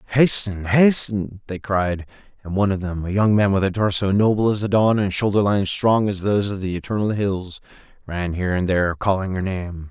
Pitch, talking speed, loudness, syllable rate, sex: 100 Hz, 210 wpm, -20 LUFS, 5.5 syllables/s, male